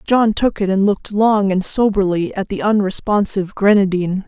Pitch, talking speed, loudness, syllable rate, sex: 200 Hz, 170 wpm, -16 LUFS, 5.3 syllables/s, female